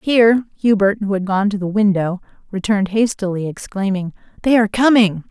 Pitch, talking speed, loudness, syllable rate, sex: 205 Hz, 160 wpm, -17 LUFS, 5.6 syllables/s, female